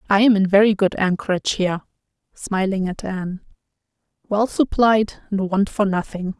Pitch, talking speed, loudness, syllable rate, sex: 195 Hz, 150 wpm, -20 LUFS, 5.0 syllables/s, female